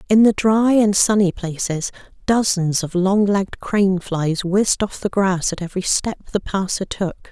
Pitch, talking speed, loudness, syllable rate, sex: 195 Hz, 180 wpm, -19 LUFS, 4.7 syllables/s, female